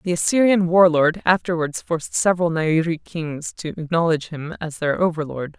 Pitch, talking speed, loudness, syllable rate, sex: 165 Hz, 160 wpm, -20 LUFS, 5.1 syllables/s, female